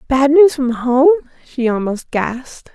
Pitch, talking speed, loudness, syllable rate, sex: 265 Hz, 155 wpm, -15 LUFS, 4.1 syllables/s, female